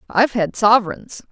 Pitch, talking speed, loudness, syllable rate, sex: 215 Hz, 135 wpm, -16 LUFS, 5.6 syllables/s, female